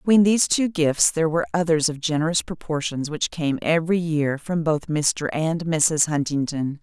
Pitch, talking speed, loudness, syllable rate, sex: 160 Hz, 175 wpm, -22 LUFS, 5.0 syllables/s, female